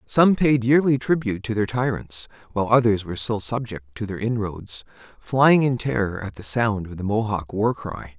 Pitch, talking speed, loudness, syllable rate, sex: 110 Hz, 190 wpm, -22 LUFS, 5.0 syllables/s, male